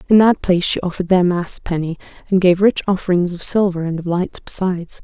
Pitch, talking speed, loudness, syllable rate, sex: 180 Hz, 215 wpm, -17 LUFS, 6.0 syllables/s, female